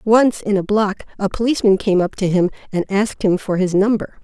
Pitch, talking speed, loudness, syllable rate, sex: 200 Hz, 225 wpm, -18 LUFS, 5.8 syllables/s, female